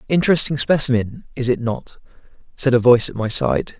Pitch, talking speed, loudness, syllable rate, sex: 130 Hz, 175 wpm, -18 LUFS, 5.7 syllables/s, male